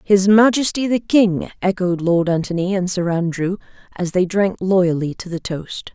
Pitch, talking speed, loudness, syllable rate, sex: 185 Hz, 170 wpm, -18 LUFS, 4.5 syllables/s, female